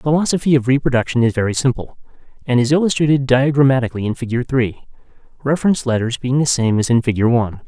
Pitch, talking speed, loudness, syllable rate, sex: 130 Hz, 180 wpm, -17 LUFS, 6.7 syllables/s, male